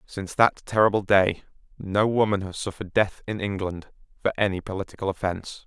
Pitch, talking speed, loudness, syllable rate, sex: 100 Hz, 160 wpm, -25 LUFS, 5.8 syllables/s, male